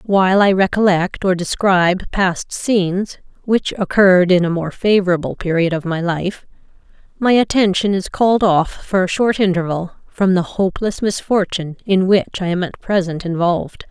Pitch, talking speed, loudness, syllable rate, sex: 185 Hz, 160 wpm, -16 LUFS, 5.0 syllables/s, female